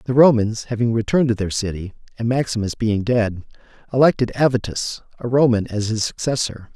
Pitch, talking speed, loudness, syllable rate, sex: 115 Hz, 160 wpm, -20 LUFS, 5.6 syllables/s, male